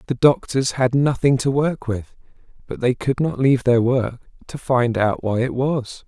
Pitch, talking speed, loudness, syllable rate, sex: 125 Hz, 200 wpm, -20 LUFS, 4.5 syllables/s, male